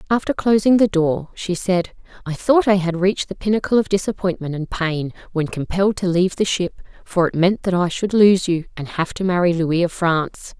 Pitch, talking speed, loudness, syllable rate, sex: 185 Hz, 215 wpm, -19 LUFS, 5.4 syllables/s, female